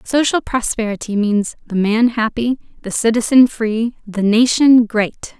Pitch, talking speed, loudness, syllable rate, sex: 230 Hz, 135 wpm, -16 LUFS, 4.1 syllables/s, female